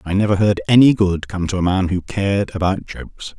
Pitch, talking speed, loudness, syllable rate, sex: 95 Hz, 230 wpm, -17 LUFS, 5.6 syllables/s, male